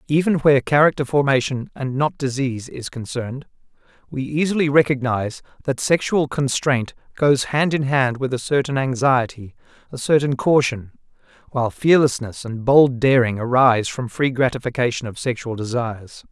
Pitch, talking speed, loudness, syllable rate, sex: 130 Hz, 140 wpm, -19 LUFS, 5.2 syllables/s, male